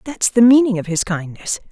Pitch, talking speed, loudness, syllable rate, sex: 210 Hz, 210 wpm, -16 LUFS, 5.3 syllables/s, female